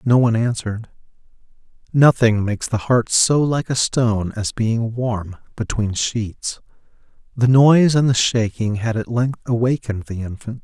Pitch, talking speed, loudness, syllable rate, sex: 115 Hz, 150 wpm, -18 LUFS, 4.7 syllables/s, male